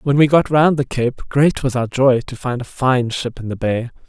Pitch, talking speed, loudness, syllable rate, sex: 130 Hz, 265 wpm, -17 LUFS, 4.8 syllables/s, male